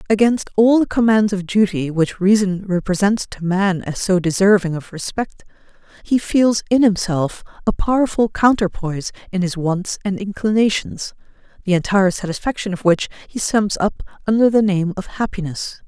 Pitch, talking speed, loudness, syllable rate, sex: 200 Hz, 155 wpm, -18 LUFS, 5.0 syllables/s, female